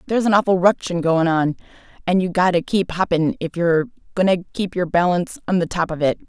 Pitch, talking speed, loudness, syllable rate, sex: 180 Hz, 230 wpm, -19 LUFS, 5.8 syllables/s, female